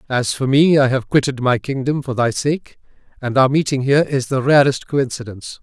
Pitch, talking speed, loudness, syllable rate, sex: 135 Hz, 205 wpm, -17 LUFS, 5.4 syllables/s, male